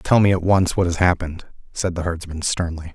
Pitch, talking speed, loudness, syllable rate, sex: 85 Hz, 225 wpm, -20 LUFS, 5.6 syllables/s, male